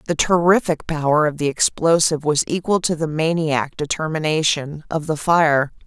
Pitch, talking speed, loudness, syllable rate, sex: 155 Hz, 155 wpm, -19 LUFS, 4.9 syllables/s, female